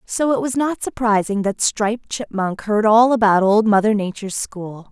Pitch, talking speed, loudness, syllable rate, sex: 215 Hz, 185 wpm, -18 LUFS, 4.8 syllables/s, female